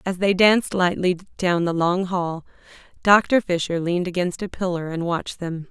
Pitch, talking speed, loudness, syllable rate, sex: 180 Hz, 180 wpm, -21 LUFS, 5.0 syllables/s, female